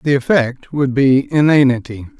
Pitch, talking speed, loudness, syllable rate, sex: 135 Hz, 135 wpm, -14 LUFS, 4.5 syllables/s, male